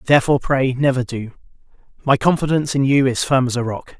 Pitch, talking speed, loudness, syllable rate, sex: 130 Hz, 195 wpm, -18 LUFS, 6.3 syllables/s, male